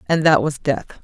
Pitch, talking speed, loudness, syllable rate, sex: 150 Hz, 235 wpm, -18 LUFS, 5.2 syllables/s, female